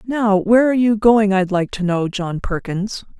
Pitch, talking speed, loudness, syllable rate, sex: 205 Hz, 205 wpm, -17 LUFS, 4.7 syllables/s, female